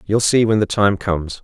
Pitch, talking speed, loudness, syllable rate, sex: 100 Hz, 250 wpm, -17 LUFS, 5.4 syllables/s, male